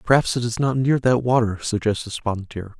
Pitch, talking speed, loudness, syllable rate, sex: 115 Hz, 215 wpm, -21 LUFS, 5.6 syllables/s, male